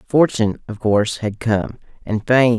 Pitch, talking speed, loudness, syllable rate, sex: 115 Hz, 160 wpm, -19 LUFS, 4.5 syllables/s, male